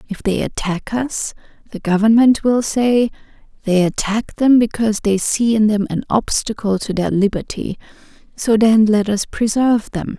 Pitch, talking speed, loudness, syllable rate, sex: 215 Hz, 160 wpm, -17 LUFS, 4.7 syllables/s, female